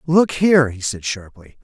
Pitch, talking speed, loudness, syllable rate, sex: 135 Hz, 185 wpm, -17 LUFS, 4.8 syllables/s, male